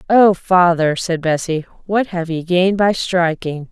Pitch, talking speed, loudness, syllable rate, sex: 175 Hz, 160 wpm, -16 LUFS, 4.2 syllables/s, female